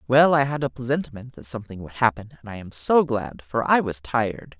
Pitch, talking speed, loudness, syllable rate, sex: 120 Hz, 235 wpm, -23 LUFS, 5.7 syllables/s, male